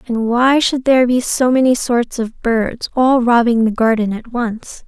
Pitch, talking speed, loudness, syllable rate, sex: 240 Hz, 195 wpm, -15 LUFS, 4.3 syllables/s, female